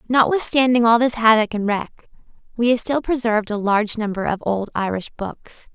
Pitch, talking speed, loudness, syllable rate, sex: 225 Hz, 180 wpm, -19 LUFS, 5.2 syllables/s, female